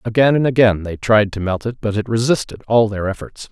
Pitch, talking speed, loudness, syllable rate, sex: 110 Hz, 240 wpm, -17 LUFS, 5.6 syllables/s, male